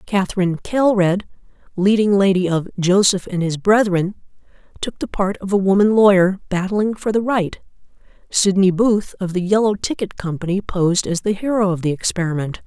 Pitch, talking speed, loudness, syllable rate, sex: 190 Hz, 160 wpm, -18 LUFS, 5.3 syllables/s, female